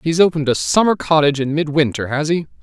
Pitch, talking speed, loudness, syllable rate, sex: 150 Hz, 230 wpm, -17 LUFS, 6.5 syllables/s, male